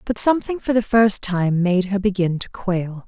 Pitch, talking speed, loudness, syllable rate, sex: 200 Hz, 215 wpm, -19 LUFS, 4.7 syllables/s, female